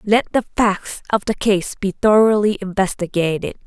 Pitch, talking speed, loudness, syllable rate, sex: 200 Hz, 145 wpm, -18 LUFS, 4.5 syllables/s, female